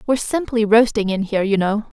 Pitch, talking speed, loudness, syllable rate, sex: 220 Hz, 210 wpm, -18 LUFS, 6.4 syllables/s, female